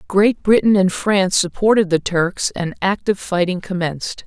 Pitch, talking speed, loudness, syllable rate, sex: 190 Hz, 155 wpm, -17 LUFS, 4.9 syllables/s, female